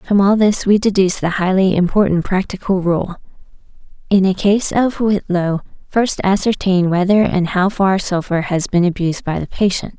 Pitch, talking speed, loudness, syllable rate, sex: 190 Hz, 170 wpm, -16 LUFS, 4.9 syllables/s, female